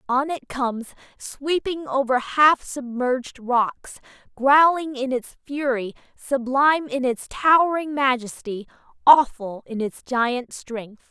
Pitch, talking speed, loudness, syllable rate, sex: 260 Hz, 120 wpm, -21 LUFS, 3.7 syllables/s, female